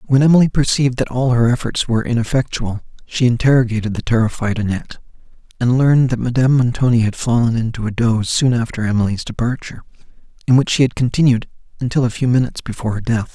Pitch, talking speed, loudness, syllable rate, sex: 120 Hz, 180 wpm, -17 LUFS, 6.8 syllables/s, male